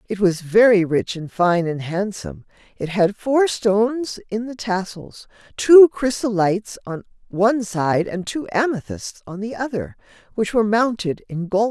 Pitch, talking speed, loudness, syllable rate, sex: 210 Hz, 155 wpm, -19 LUFS, 4.5 syllables/s, female